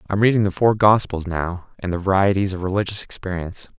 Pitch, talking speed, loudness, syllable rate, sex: 95 Hz, 190 wpm, -20 LUFS, 6.1 syllables/s, male